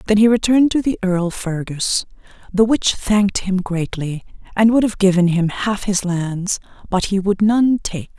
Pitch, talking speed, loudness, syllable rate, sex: 200 Hz, 185 wpm, -18 LUFS, 4.5 syllables/s, female